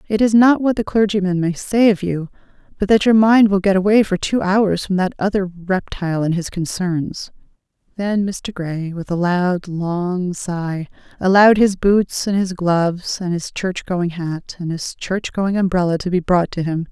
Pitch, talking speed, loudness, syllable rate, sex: 185 Hz, 200 wpm, -18 LUFS, 4.5 syllables/s, female